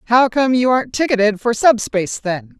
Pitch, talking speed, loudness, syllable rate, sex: 230 Hz, 185 wpm, -16 LUFS, 5.4 syllables/s, female